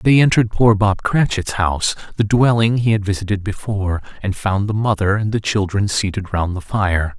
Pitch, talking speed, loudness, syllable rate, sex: 100 Hz, 190 wpm, -18 LUFS, 5.3 syllables/s, male